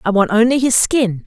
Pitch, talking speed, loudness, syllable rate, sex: 225 Hz, 240 wpm, -14 LUFS, 5.1 syllables/s, female